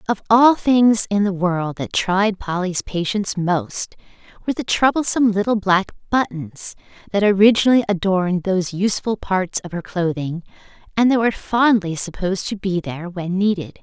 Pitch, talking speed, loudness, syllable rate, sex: 195 Hz, 155 wpm, -19 LUFS, 5.2 syllables/s, female